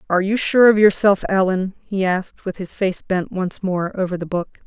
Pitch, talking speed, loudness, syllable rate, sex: 190 Hz, 220 wpm, -19 LUFS, 5.2 syllables/s, female